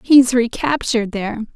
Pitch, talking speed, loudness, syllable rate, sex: 240 Hz, 115 wpm, -17 LUFS, 5.3 syllables/s, female